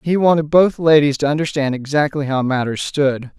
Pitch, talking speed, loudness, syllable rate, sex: 145 Hz, 175 wpm, -16 LUFS, 5.3 syllables/s, male